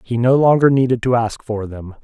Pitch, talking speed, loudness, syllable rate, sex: 120 Hz, 235 wpm, -16 LUFS, 5.3 syllables/s, male